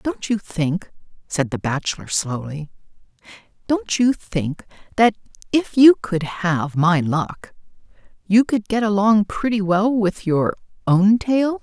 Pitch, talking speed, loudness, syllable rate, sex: 195 Hz, 140 wpm, -19 LUFS, 3.8 syllables/s, female